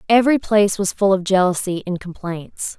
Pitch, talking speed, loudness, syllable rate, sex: 195 Hz, 170 wpm, -19 LUFS, 5.5 syllables/s, female